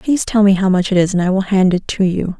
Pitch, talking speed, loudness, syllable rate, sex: 190 Hz, 350 wpm, -15 LUFS, 6.4 syllables/s, female